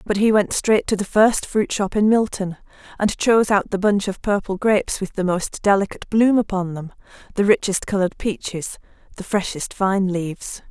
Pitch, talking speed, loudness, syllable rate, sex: 200 Hz, 180 wpm, -20 LUFS, 5.2 syllables/s, female